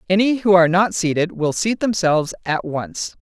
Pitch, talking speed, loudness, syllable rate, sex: 185 Hz, 185 wpm, -18 LUFS, 5.2 syllables/s, female